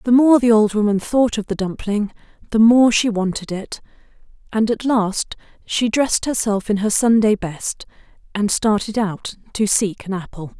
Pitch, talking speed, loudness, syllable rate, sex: 215 Hz, 175 wpm, -18 LUFS, 4.6 syllables/s, female